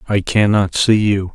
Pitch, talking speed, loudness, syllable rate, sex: 100 Hz, 180 wpm, -15 LUFS, 4.3 syllables/s, male